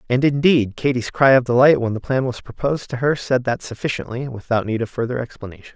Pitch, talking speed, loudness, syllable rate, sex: 125 Hz, 220 wpm, -19 LUFS, 6.2 syllables/s, male